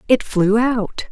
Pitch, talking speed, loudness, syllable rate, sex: 220 Hz, 160 wpm, -17 LUFS, 3.3 syllables/s, female